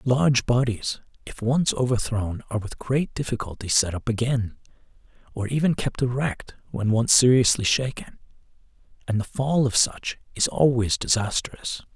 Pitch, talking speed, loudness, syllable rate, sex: 120 Hz, 140 wpm, -23 LUFS, 4.7 syllables/s, male